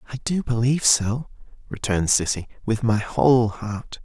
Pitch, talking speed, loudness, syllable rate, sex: 115 Hz, 150 wpm, -22 LUFS, 5.0 syllables/s, male